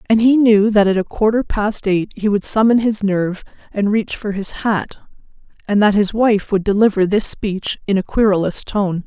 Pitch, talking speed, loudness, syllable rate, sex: 205 Hz, 205 wpm, -16 LUFS, 4.8 syllables/s, female